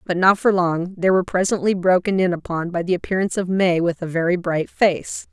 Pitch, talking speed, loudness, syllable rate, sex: 180 Hz, 225 wpm, -20 LUFS, 5.6 syllables/s, female